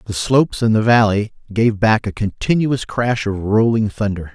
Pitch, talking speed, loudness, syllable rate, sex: 110 Hz, 180 wpm, -17 LUFS, 4.8 syllables/s, male